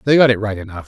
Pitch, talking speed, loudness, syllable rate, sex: 110 Hz, 345 wpm, -15 LUFS, 8.2 syllables/s, male